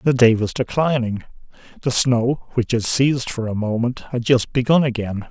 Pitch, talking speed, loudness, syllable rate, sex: 120 Hz, 180 wpm, -19 LUFS, 4.9 syllables/s, male